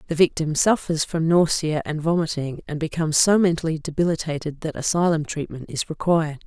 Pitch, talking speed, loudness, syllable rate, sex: 160 Hz, 160 wpm, -22 LUFS, 5.7 syllables/s, female